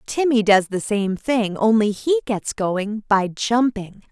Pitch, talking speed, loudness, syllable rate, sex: 220 Hz, 160 wpm, -20 LUFS, 3.7 syllables/s, female